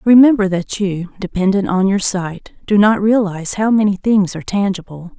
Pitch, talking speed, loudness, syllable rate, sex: 195 Hz, 175 wpm, -15 LUFS, 5.1 syllables/s, female